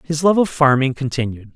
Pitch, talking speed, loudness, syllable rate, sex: 140 Hz, 195 wpm, -17 LUFS, 5.5 syllables/s, male